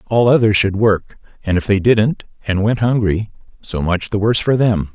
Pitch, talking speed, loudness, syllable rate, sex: 105 Hz, 205 wpm, -16 LUFS, 4.9 syllables/s, male